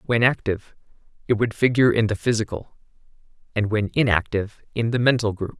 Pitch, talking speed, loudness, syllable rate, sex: 110 Hz, 160 wpm, -22 LUFS, 6.2 syllables/s, male